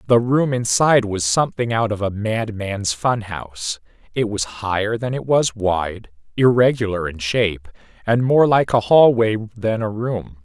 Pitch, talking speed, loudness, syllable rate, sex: 110 Hz, 160 wpm, -19 LUFS, 4.6 syllables/s, male